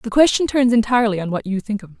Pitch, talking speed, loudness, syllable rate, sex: 225 Hz, 300 wpm, -18 LUFS, 7.2 syllables/s, female